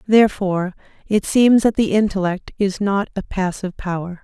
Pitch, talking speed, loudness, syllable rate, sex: 195 Hz, 155 wpm, -19 LUFS, 5.3 syllables/s, female